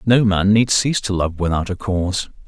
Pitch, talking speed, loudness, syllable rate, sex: 100 Hz, 220 wpm, -18 LUFS, 5.4 syllables/s, male